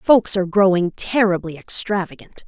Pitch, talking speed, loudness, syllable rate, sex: 190 Hz, 120 wpm, -18 LUFS, 4.9 syllables/s, female